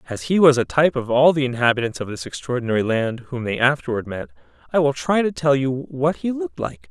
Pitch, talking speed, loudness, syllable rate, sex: 130 Hz, 235 wpm, -20 LUFS, 6.2 syllables/s, male